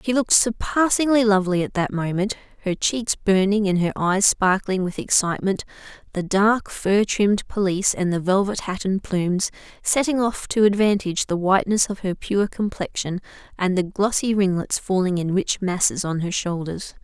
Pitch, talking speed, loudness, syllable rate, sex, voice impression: 195 Hz, 170 wpm, -21 LUFS, 5.1 syllables/s, female, feminine, slightly young, tensed, clear, fluent, slightly intellectual, slightly friendly, slightly elegant, slightly sweet, slightly sharp